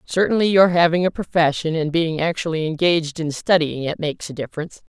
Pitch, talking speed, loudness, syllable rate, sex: 165 Hz, 180 wpm, -19 LUFS, 6.1 syllables/s, female